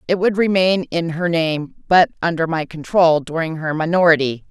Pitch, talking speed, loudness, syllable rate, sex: 165 Hz, 175 wpm, -17 LUFS, 5.0 syllables/s, female